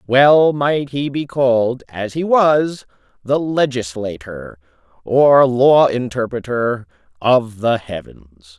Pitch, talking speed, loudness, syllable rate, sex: 125 Hz, 110 wpm, -16 LUFS, 3.3 syllables/s, male